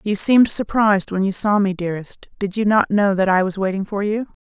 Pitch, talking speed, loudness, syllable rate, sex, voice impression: 200 Hz, 245 wpm, -18 LUFS, 5.8 syllables/s, female, feminine, adult-like, slightly muffled, sincere, slightly calm, slightly unique